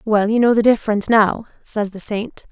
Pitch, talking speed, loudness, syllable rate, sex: 215 Hz, 215 wpm, -17 LUFS, 5.3 syllables/s, female